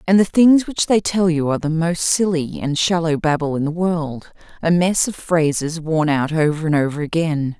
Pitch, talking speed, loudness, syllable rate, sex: 165 Hz, 215 wpm, -18 LUFS, 4.9 syllables/s, female